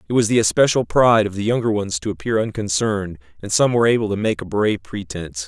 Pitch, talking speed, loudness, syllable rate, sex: 105 Hz, 230 wpm, -19 LUFS, 6.7 syllables/s, male